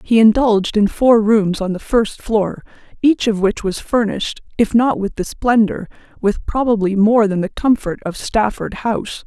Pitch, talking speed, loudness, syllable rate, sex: 220 Hz, 180 wpm, -16 LUFS, 4.6 syllables/s, female